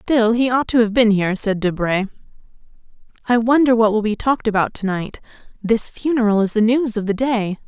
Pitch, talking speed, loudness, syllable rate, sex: 220 Hz, 205 wpm, -18 LUFS, 5.5 syllables/s, female